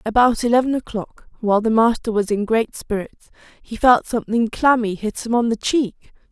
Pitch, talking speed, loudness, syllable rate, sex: 225 Hz, 180 wpm, -19 LUFS, 5.1 syllables/s, female